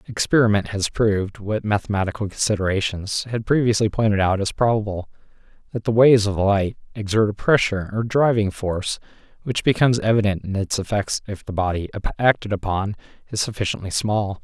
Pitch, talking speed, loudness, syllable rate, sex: 105 Hz, 155 wpm, -21 LUFS, 5.8 syllables/s, male